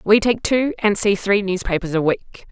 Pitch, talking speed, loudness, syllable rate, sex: 200 Hz, 215 wpm, -19 LUFS, 4.7 syllables/s, female